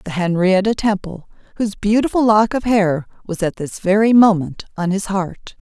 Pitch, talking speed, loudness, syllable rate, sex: 195 Hz, 170 wpm, -17 LUFS, 4.9 syllables/s, female